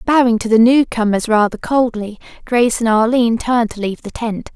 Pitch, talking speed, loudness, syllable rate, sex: 230 Hz, 185 wpm, -15 LUFS, 5.7 syllables/s, female